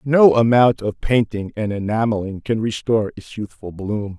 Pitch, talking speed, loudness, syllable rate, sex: 110 Hz, 160 wpm, -19 LUFS, 4.7 syllables/s, male